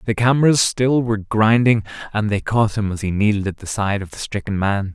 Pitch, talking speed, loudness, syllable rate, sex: 105 Hz, 230 wpm, -19 LUFS, 5.5 syllables/s, male